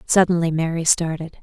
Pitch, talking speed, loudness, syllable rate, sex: 165 Hz, 125 wpm, -19 LUFS, 5.5 syllables/s, female